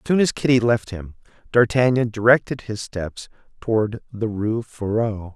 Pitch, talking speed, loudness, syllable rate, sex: 115 Hz, 145 wpm, -21 LUFS, 4.6 syllables/s, male